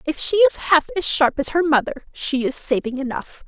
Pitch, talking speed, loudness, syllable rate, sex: 280 Hz, 225 wpm, -19 LUFS, 5.2 syllables/s, female